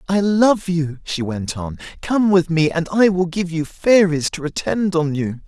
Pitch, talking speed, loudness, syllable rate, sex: 170 Hz, 210 wpm, -18 LUFS, 4.2 syllables/s, male